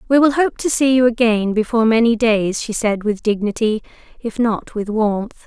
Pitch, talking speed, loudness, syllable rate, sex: 225 Hz, 195 wpm, -17 LUFS, 4.9 syllables/s, female